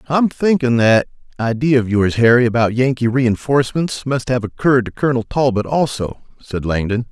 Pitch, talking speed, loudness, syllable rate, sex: 125 Hz, 160 wpm, -16 LUFS, 5.3 syllables/s, male